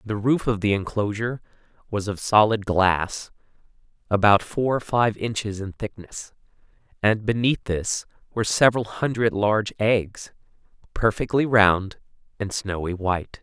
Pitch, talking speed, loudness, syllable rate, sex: 105 Hz, 130 wpm, -23 LUFS, 4.6 syllables/s, male